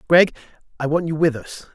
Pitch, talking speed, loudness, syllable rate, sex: 155 Hz, 205 wpm, -20 LUFS, 5.7 syllables/s, male